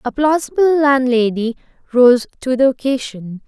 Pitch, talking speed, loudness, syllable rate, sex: 260 Hz, 120 wpm, -15 LUFS, 4.6 syllables/s, female